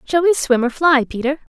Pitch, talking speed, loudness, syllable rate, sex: 285 Hz, 235 wpm, -17 LUFS, 5.0 syllables/s, female